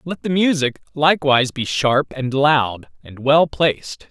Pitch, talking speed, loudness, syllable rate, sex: 140 Hz, 160 wpm, -18 LUFS, 4.3 syllables/s, male